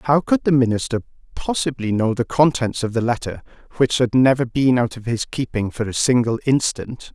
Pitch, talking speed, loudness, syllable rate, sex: 125 Hz, 195 wpm, -19 LUFS, 5.1 syllables/s, male